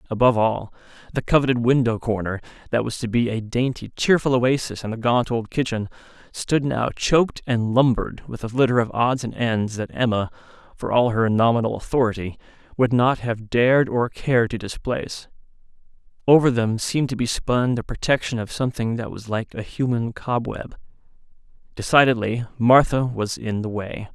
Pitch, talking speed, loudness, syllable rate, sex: 120 Hz, 170 wpm, -21 LUFS, 5.3 syllables/s, male